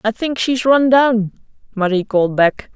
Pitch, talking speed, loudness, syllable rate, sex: 225 Hz, 175 wpm, -15 LUFS, 4.5 syllables/s, female